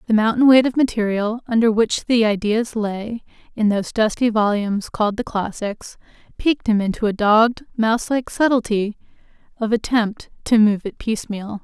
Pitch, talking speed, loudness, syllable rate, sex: 220 Hz, 155 wpm, -19 LUFS, 5.3 syllables/s, female